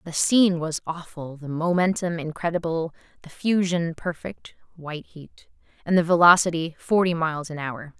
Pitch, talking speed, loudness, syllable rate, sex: 165 Hz, 145 wpm, -23 LUFS, 5.2 syllables/s, female